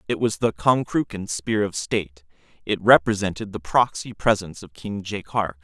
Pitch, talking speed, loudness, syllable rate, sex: 100 Hz, 160 wpm, -22 LUFS, 5.0 syllables/s, male